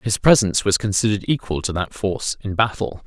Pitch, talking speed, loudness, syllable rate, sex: 105 Hz, 195 wpm, -20 LUFS, 6.1 syllables/s, male